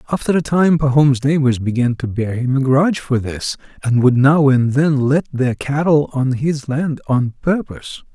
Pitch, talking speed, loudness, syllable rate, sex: 135 Hz, 190 wpm, -16 LUFS, 4.6 syllables/s, male